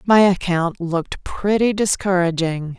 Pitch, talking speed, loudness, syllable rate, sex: 185 Hz, 110 wpm, -19 LUFS, 4.1 syllables/s, female